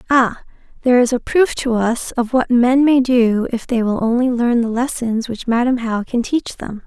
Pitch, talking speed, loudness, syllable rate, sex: 240 Hz, 220 wpm, -17 LUFS, 4.7 syllables/s, female